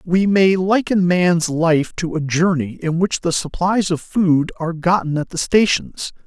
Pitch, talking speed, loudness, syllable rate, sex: 175 Hz, 180 wpm, -17 LUFS, 4.2 syllables/s, male